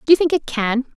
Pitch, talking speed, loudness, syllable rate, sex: 275 Hz, 305 wpm, -18 LUFS, 6.1 syllables/s, female